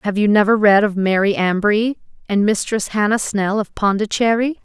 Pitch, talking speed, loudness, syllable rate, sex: 205 Hz, 170 wpm, -17 LUFS, 5.0 syllables/s, female